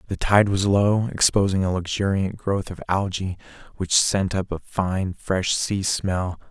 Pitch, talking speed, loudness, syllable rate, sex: 95 Hz, 165 wpm, -22 LUFS, 4.0 syllables/s, male